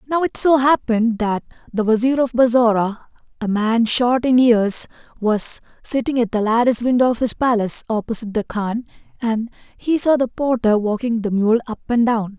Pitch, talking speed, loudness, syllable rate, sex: 235 Hz, 180 wpm, -18 LUFS, 5.1 syllables/s, female